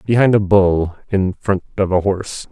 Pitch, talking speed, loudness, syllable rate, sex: 95 Hz, 190 wpm, -17 LUFS, 4.8 syllables/s, male